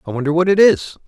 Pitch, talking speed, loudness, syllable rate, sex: 155 Hz, 280 wpm, -15 LUFS, 7.0 syllables/s, male